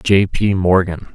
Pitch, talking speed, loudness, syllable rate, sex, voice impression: 95 Hz, 155 wpm, -16 LUFS, 3.8 syllables/s, male, very masculine, very adult-like, old, very thick, slightly relaxed, powerful, dark, soft, muffled, slightly fluent, slightly raspy, very cool, intellectual, very sincere, very calm, very mature, very friendly, very reassuring, very unique, slightly elegant, very wild, kind, very modest